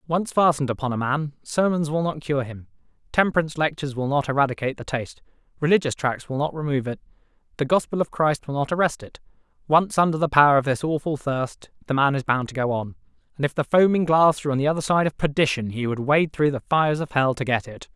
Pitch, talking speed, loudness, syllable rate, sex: 145 Hz, 230 wpm, -22 LUFS, 6.4 syllables/s, male